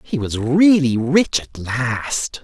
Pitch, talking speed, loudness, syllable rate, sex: 135 Hz, 150 wpm, -18 LUFS, 3.0 syllables/s, male